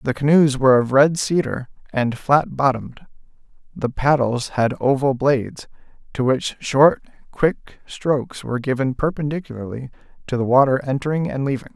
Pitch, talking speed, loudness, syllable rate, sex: 135 Hz, 145 wpm, -19 LUFS, 5.2 syllables/s, male